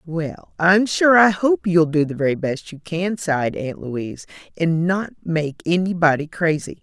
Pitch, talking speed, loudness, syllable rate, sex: 170 Hz, 185 wpm, -19 LUFS, 4.4 syllables/s, female